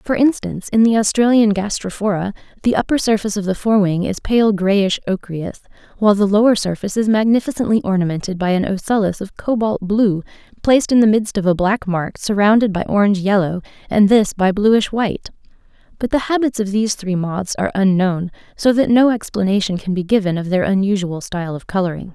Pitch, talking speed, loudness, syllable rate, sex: 205 Hz, 185 wpm, -17 LUFS, 5.8 syllables/s, female